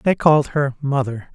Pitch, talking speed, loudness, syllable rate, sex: 140 Hz, 180 wpm, -19 LUFS, 4.8 syllables/s, male